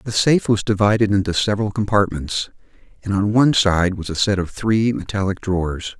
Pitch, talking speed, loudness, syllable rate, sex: 100 Hz, 180 wpm, -19 LUFS, 5.6 syllables/s, male